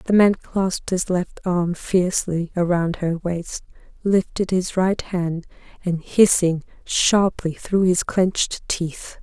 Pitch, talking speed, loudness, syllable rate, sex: 180 Hz, 135 wpm, -21 LUFS, 3.6 syllables/s, female